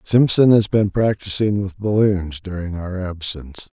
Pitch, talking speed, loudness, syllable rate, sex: 95 Hz, 145 wpm, -19 LUFS, 4.6 syllables/s, male